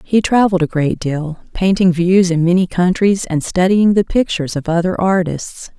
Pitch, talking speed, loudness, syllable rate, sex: 180 Hz, 175 wpm, -15 LUFS, 4.9 syllables/s, female